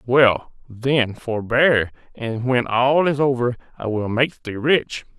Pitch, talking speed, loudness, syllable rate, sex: 125 Hz, 150 wpm, -20 LUFS, 3.5 syllables/s, male